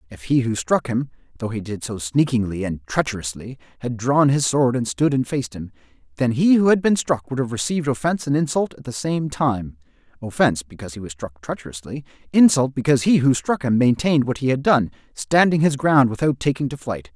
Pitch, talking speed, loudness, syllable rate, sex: 125 Hz, 215 wpm, -20 LUFS, 5.8 syllables/s, male